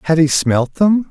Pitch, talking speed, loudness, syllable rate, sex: 165 Hz, 215 wpm, -14 LUFS, 4.3 syllables/s, male